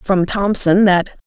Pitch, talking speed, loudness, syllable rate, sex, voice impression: 190 Hz, 140 wpm, -14 LUFS, 3.9 syllables/s, female, feminine, middle-aged, tensed, powerful, clear, fluent, slightly raspy, intellectual, calm, friendly, reassuring, elegant, lively, slightly kind